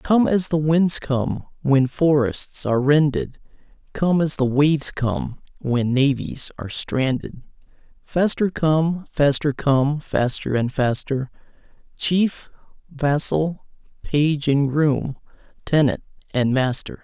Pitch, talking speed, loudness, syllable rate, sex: 145 Hz, 115 wpm, -20 LUFS, 3.5 syllables/s, male